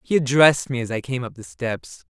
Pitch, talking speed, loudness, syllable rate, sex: 125 Hz, 255 wpm, -21 LUFS, 5.7 syllables/s, male